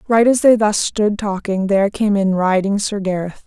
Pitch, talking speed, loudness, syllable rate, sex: 205 Hz, 210 wpm, -16 LUFS, 4.9 syllables/s, female